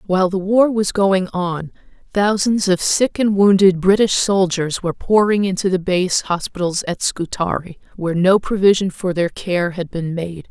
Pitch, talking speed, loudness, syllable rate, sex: 185 Hz, 170 wpm, -17 LUFS, 4.6 syllables/s, female